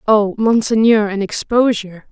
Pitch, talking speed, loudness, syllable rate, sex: 215 Hz, 115 wpm, -15 LUFS, 4.8 syllables/s, female